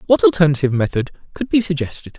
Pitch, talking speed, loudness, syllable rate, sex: 155 Hz, 165 wpm, -17 LUFS, 7.1 syllables/s, male